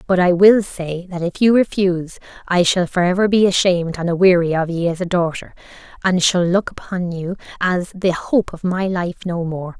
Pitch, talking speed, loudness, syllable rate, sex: 180 Hz, 210 wpm, -18 LUFS, 5.1 syllables/s, female